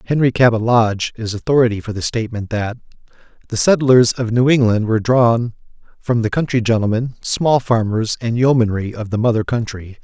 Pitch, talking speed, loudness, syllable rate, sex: 115 Hz, 165 wpm, -16 LUFS, 5.5 syllables/s, male